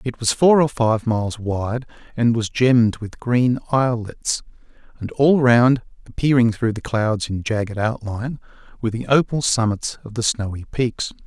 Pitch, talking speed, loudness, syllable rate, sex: 115 Hz, 165 wpm, -20 LUFS, 4.6 syllables/s, male